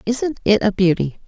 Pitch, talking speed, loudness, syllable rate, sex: 215 Hz, 190 wpm, -18 LUFS, 4.7 syllables/s, female